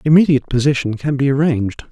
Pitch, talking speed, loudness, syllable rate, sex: 135 Hz, 155 wpm, -16 LUFS, 7.1 syllables/s, male